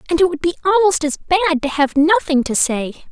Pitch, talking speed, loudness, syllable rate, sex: 325 Hz, 230 wpm, -16 LUFS, 5.7 syllables/s, female